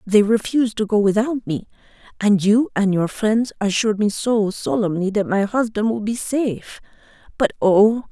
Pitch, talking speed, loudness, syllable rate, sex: 210 Hz, 170 wpm, -19 LUFS, 4.8 syllables/s, female